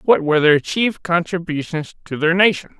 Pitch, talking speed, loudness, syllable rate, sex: 170 Hz, 170 wpm, -17 LUFS, 5.1 syllables/s, male